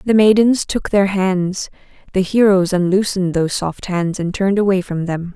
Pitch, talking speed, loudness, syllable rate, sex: 190 Hz, 180 wpm, -16 LUFS, 4.8 syllables/s, female